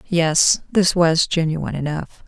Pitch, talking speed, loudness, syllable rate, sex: 165 Hz, 130 wpm, -18 LUFS, 3.9 syllables/s, female